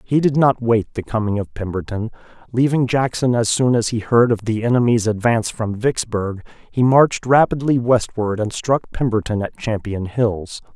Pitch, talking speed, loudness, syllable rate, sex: 115 Hz, 175 wpm, -18 LUFS, 4.9 syllables/s, male